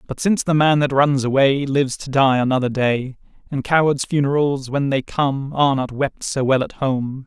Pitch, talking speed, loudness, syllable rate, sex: 135 Hz, 205 wpm, -19 LUFS, 5.0 syllables/s, male